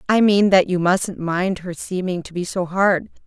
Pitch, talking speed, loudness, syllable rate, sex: 185 Hz, 220 wpm, -19 LUFS, 4.4 syllables/s, female